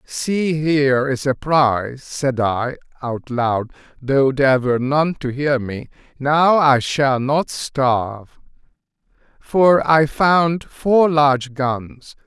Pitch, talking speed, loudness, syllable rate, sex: 140 Hz, 130 wpm, -18 LUFS, 2.6 syllables/s, male